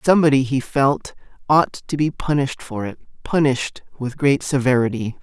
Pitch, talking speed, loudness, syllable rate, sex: 135 Hz, 140 wpm, -20 LUFS, 5.3 syllables/s, male